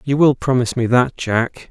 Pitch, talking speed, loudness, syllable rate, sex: 125 Hz, 210 wpm, -17 LUFS, 5.0 syllables/s, male